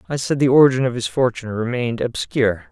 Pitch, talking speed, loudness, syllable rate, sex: 120 Hz, 200 wpm, -19 LUFS, 6.8 syllables/s, male